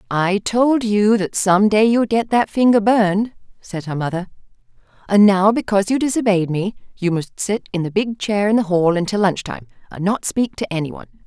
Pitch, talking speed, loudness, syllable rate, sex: 200 Hz, 210 wpm, -18 LUFS, 5.2 syllables/s, female